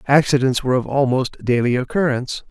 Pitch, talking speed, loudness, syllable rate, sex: 130 Hz, 145 wpm, -18 LUFS, 6.0 syllables/s, male